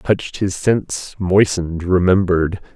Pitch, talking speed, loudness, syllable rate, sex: 90 Hz, 110 wpm, -17 LUFS, 4.7 syllables/s, male